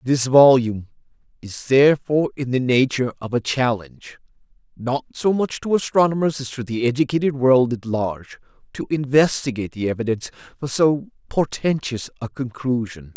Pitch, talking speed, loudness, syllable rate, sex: 130 Hz, 140 wpm, -20 LUFS, 5.4 syllables/s, male